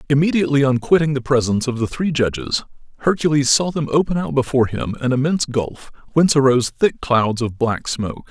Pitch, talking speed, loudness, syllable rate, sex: 135 Hz, 190 wpm, -18 LUFS, 6.2 syllables/s, male